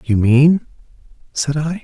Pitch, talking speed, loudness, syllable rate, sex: 145 Hz, 130 wpm, -15 LUFS, 3.7 syllables/s, male